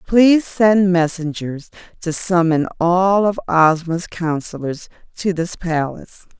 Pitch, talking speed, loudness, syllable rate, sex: 175 Hz, 115 wpm, -17 LUFS, 3.9 syllables/s, female